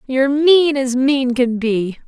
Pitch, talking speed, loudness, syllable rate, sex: 265 Hz, 175 wpm, -15 LUFS, 3.8 syllables/s, female